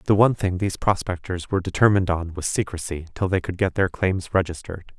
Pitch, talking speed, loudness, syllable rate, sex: 90 Hz, 205 wpm, -23 LUFS, 6.2 syllables/s, male